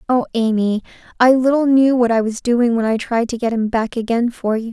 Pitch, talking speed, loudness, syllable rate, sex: 235 Hz, 240 wpm, -17 LUFS, 5.3 syllables/s, female